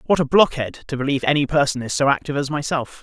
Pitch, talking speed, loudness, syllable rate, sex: 140 Hz, 240 wpm, -20 LUFS, 6.8 syllables/s, male